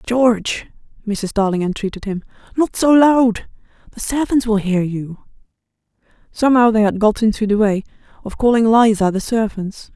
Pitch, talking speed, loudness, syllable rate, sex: 220 Hz, 150 wpm, -17 LUFS, 5.0 syllables/s, female